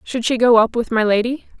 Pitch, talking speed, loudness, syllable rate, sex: 235 Hz, 265 wpm, -16 LUFS, 5.7 syllables/s, female